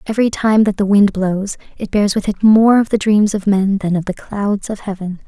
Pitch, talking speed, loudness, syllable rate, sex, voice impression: 205 Hz, 250 wpm, -15 LUFS, 5.1 syllables/s, female, very feminine, young, very thin, slightly tensed, very weak, soft, very clear, very fluent, very cute, very intellectual, very refreshing, sincere, calm, very friendly, very reassuring, very unique, very elegant, slightly wild, very kind, sharp, very modest, very light